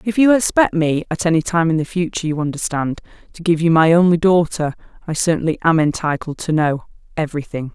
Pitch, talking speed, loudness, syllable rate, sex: 165 Hz, 170 wpm, -17 LUFS, 6.1 syllables/s, female